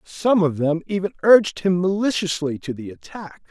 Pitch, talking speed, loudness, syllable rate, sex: 170 Hz, 170 wpm, -20 LUFS, 5.0 syllables/s, male